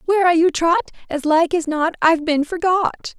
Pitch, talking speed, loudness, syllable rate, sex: 330 Hz, 205 wpm, -18 LUFS, 5.6 syllables/s, female